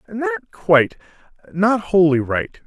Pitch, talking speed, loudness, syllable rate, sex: 170 Hz, 115 wpm, -18 LUFS, 4.0 syllables/s, male